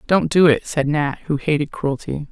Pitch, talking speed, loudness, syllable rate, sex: 150 Hz, 205 wpm, -19 LUFS, 4.9 syllables/s, female